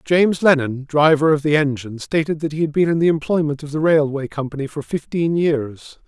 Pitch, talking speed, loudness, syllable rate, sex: 150 Hz, 210 wpm, -18 LUFS, 5.6 syllables/s, male